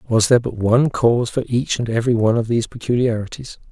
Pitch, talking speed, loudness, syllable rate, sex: 115 Hz, 210 wpm, -18 LUFS, 6.8 syllables/s, male